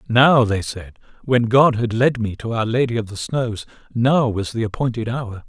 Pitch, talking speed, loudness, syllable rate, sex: 115 Hz, 210 wpm, -19 LUFS, 4.6 syllables/s, male